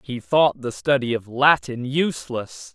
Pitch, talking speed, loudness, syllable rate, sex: 130 Hz, 155 wpm, -21 LUFS, 4.2 syllables/s, male